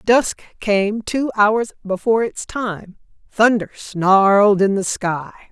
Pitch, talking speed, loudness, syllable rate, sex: 205 Hz, 130 wpm, -18 LUFS, 3.6 syllables/s, female